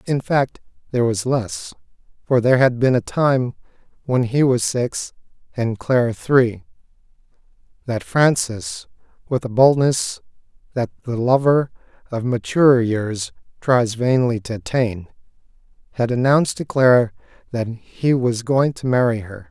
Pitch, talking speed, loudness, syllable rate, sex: 125 Hz, 135 wpm, -19 LUFS, 4.3 syllables/s, male